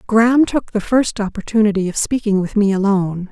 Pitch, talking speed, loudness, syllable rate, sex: 210 Hz, 180 wpm, -17 LUFS, 5.7 syllables/s, female